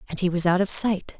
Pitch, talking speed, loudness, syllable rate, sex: 185 Hz, 300 wpm, -20 LUFS, 6.1 syllables/s, female